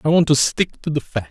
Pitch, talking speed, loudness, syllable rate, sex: 145 Hz, 320 wpm, -19 LUFS, 5.8 syllables/s, male